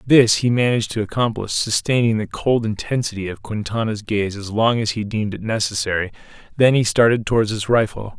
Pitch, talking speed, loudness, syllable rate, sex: 110 Hz, 185 wpm, -19 LUFS, 5.6 syllables/s, male